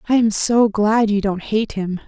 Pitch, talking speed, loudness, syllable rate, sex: 210 Hz, 230 wpm, -18 LUFS, 4.3 syllables/s, female